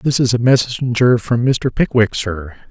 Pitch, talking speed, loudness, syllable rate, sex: 120 Hz, 175 wpm, -15 LUFS, 4.3 syllables/s, male